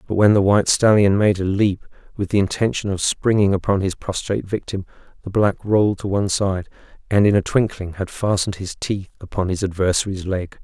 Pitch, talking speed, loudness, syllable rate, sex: 100 Hz, 195 wpm, -19 LUFS, 5.7 syllables/s, male